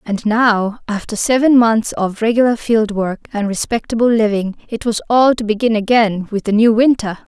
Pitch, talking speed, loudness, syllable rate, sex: 220 Hz, 180 wpm, -15 LUFS, 4.9 syllables/s, female